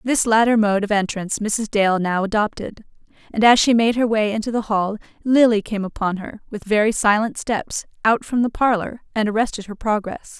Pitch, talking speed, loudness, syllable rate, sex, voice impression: 215 Hz, 195 wpm, -19 LUFS, 5.1 syllables/s, female, feminine, adult-like, slightly refreshing, slightly calm, friendly, slightly sweet